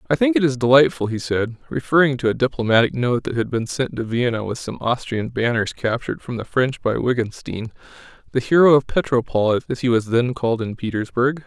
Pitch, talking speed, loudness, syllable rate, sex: 120 Hz, 205 wpm, -20 LUFS, 5.7 syllables/s, male